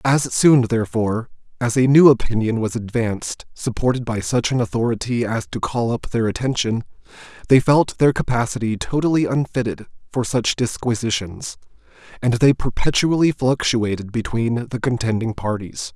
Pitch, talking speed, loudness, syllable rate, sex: 120 Hz, 140 wpm, -20 LUFS, 5.1 syllables/s, male